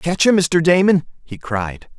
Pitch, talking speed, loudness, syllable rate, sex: 160 Hz, 180 wpm, -16 LUFS, 4.0 syllables/s, male